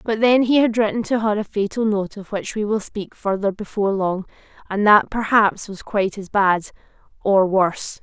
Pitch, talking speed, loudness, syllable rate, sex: 205 Hz, 195 wpm, -20 LUFS, 5.1 syllables/s, female